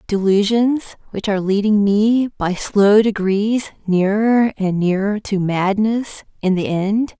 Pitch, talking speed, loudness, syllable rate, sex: 205 Hz, 135 wpm, -17 LUFS, 3.9 syllables/s, female